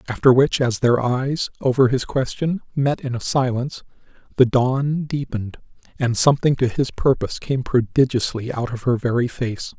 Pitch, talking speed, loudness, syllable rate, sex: 130 Hz, 165 wpm, -20 LUFS, 5.0 syllables/s, male